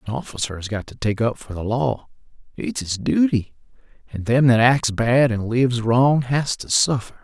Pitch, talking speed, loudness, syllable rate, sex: 120 Hz, 180 wpm, -20 LUFS, 4.9 syllables/s, male